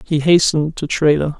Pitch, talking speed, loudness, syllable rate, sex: 155 Hz, 170 wpm, -15 LUFS, 5.7 syllables/s, male